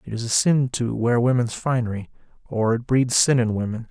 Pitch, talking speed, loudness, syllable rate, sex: 120 Hz, 215 wpm, -21 LUFS, 5.2 syllables/s, male